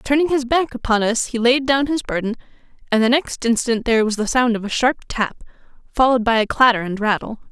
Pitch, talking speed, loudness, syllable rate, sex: 240 Hz, 225 wpm, -18 LUFS, 6.0 syllables/s, female